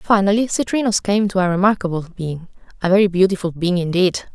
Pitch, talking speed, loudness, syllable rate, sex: 190 Hz, 165 wpm, -18 LUFS, 5.8 syllables/s, female